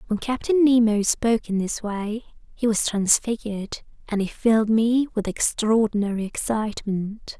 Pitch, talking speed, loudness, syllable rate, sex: 220 Hz, 140 wpm, -22 LUFS, 4.8 syllables/s, female